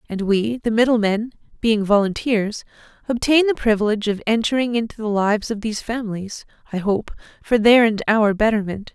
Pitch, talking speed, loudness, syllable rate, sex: 220 Hz, 160 wpm, -19 LUFS, 5.5 syllables/s, female